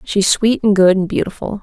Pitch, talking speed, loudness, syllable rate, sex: 200 Hz, 220 wpm, -15 LUFS, 5.2 syllables/s, female